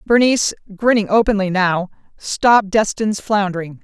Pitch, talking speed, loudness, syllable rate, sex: 205 Hz, 110 wpm, -16 LUFS, 5.0 syllables/s, female